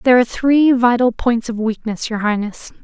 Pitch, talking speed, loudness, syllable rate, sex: 235 Hz, 190 wpm, -16 LUFS, 5.3 syllables/s, female